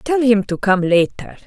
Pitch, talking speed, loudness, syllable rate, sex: 210 Hz, 205 wpm, -16 LUFS, 4.4 syllables/s, female